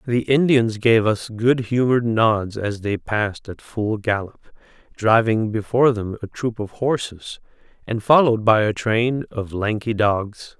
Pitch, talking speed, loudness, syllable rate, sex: 110 Hz, 160 wpm, -20 LUFS, 4.2 syllables/s, male